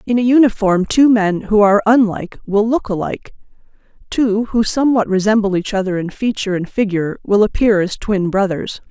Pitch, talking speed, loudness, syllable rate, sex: 210 Hz, 175 wpm, -15 LUFS, 5.7 syllables/s, female